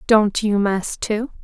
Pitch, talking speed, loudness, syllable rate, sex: 210 Hz, 165 wpm, -20 LUFS, 3.3 syllables/s, female